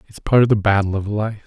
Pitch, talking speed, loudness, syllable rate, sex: 105 Hz, 285 wpm, -18 LUFS, 6.2 syllables/s, male